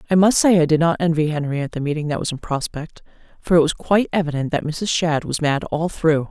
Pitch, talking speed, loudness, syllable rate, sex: 160 Hz, 250 wpm, -19 LUFS, 6.0 syllables/s, female